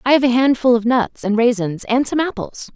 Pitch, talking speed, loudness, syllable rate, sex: 240 Hz, 240 wpm, -17 LUFS, 5.3 syllables/s, female